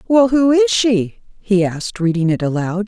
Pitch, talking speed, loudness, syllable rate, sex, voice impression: 200 Hz, 190 wpm, -16 LUFS, 4.7 syllables/s, female, feminine, middle-aged, tensed, powerful, bright, soft, fluent, slightly raspy, intellectual, calm, elegant, lively, strict, slightly sharp